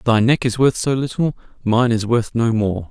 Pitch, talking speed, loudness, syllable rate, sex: 120 Hz, 250 wpm, -18 LUFS, 5.0 syllables/s, male